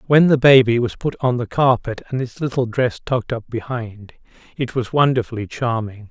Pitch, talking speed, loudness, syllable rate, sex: 120 Hz, 185 wpm, -19 LUFS, 5.2 syllables/s, male